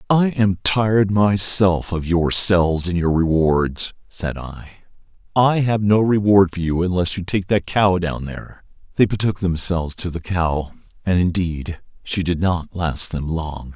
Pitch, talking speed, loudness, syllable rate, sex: 90 Hz, 165 wpm, -19 LUFS, 4.2 syllables/s, male